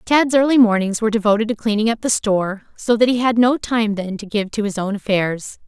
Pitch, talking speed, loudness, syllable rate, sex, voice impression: 215 Hz, 245 wpm, -18 LUFS, 5.7 syllables/s, female, feminine, slightly adult-like, tensed, slightly bright, fluent, slightly cute, slightly refreshing, friendly